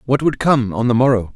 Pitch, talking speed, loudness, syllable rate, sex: 125 Hz, 265 wpm, -16 LUFS, 5.8 syllables/s, male